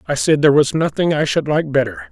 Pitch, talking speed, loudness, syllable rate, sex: 150 Hz, 255 wpm, -16 LUFS, 6.1 syllables/s, male